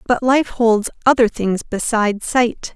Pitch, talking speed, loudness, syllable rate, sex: 230 Hz, 150 wpm, -17 LUFS, 4.1 syllables/s, female